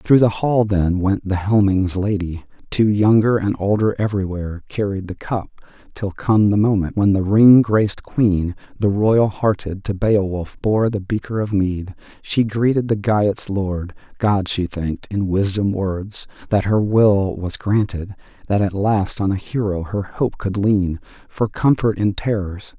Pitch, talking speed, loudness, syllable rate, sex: 100 Hz, 170 wpm, -19 LUFS, 4.2 syllables/s, male